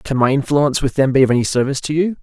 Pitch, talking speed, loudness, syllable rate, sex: 140 Hz, 295 wpm, -16 LUFS, 7.4 syllables/s, male